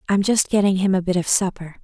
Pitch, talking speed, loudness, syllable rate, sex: 190 Hz, 260 wpm, -19 LUFS, 6.3 syllables/s, female